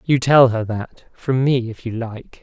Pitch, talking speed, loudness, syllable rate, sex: 120 Hz, 200 wpm, -18 LUFS, 3.9 syllables/s, male